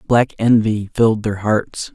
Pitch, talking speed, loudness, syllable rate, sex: 110 Hz, 155 wpm, -17 LUFS, 4.0 syllables/s, male